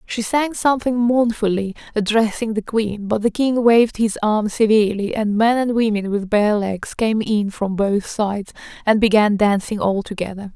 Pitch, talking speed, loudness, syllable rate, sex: 215 Hz, 175 wpm, -18 LUFS, 4.8 syllables/s, female